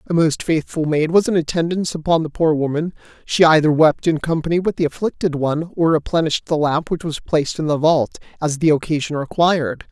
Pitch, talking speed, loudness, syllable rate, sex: 160 Hz, 205 wpm, -18 LUFS, 5.8 syllables/s, male